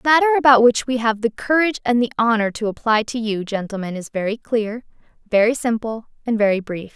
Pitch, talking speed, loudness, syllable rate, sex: 230 Hz, 205 wpm, -19 LUFS, 5.9 syllables/s, female